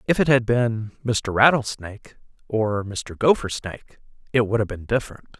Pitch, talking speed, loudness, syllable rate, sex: 115 Hz, 155 wpm, -22 LUFS, 5.0 syllables/s, male